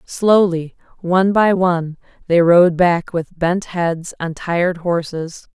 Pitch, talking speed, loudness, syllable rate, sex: 175 Hz, 140 wpm, -16 LUFS, 3.8 syllables/s, female